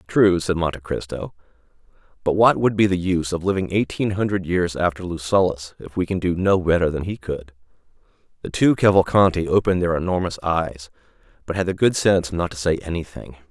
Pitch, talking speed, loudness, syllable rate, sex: 90 Hz, 185 wpm, -21 LUFS, 5.8 syllables/s, male